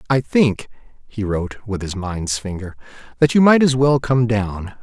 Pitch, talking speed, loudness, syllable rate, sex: 115 Hz, 185 wpm, -18 LUFS, 4.5 syllables/s, male